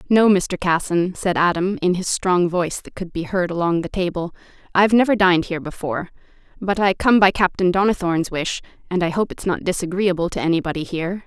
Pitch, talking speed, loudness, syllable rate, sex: 180 Hz, 195 wpm, -20 LUFS, 6.0 syllables/s, female